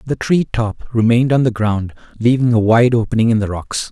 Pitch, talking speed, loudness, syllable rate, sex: 115 Hz, 215 wpm, -15 LUFS, 5.5 syllables/s, male